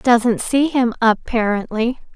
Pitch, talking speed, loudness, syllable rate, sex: 235 Hz, 110 wpm, -18 LUFS, 3.7 syllables/s, female